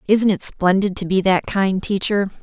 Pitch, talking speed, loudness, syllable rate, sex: 195 Hz, 200 wpm, -18 LUFS, 4.6 syllables/s, female